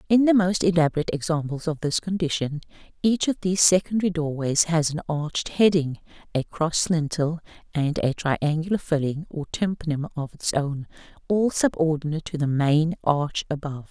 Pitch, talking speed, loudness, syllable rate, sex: 160 Hz, 155 wpm, -24 LUFS, 5.2 syllables/s, female